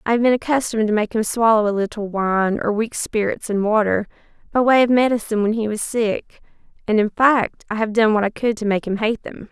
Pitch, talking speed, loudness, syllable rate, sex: 220 Hz, 240 wpm, -19 LUFS, 5.7 syllables/s, female